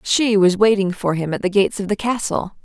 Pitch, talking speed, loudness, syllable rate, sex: 200 Hz, 250 wpm, -18 LUFS, 5.7 syllables/s, female